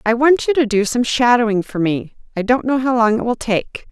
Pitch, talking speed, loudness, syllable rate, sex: 235 Hz, 260 wpm, -17 LUFS, 5.3 syllables/s, female